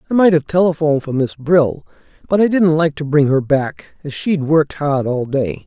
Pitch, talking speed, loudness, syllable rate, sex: 150 Hz, 220 wpm, -16 LUFS, 5.0 syllables/s, male